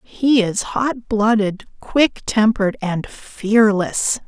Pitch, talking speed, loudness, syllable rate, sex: 215 Hz, 110 wpm, -18 LUFS, 3.1 syllables/s, female